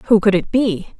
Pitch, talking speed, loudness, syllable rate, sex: 205 Hz, 240 wpm, -16 LUFS, 4.7 syllables/s, female